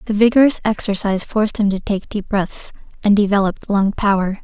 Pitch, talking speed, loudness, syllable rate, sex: 205 Hz, 175 wpm, -17 LUFS, 6.0 syllables/s, female